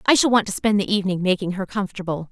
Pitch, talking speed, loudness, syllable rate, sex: 195 Hz, 260 wpm, -21 LUFS, 7.3 syllables/s, female